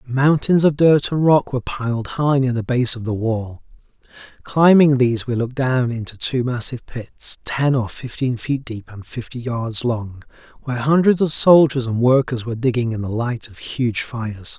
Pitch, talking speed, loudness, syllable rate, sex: 125 Hz, 190 wpm, -19 LUFS, 4.9 syllables/s, male